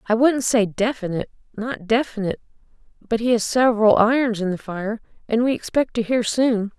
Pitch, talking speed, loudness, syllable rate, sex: 225 Hz, 175 wpm, -21 LUFS, 5.5 syllables/s, female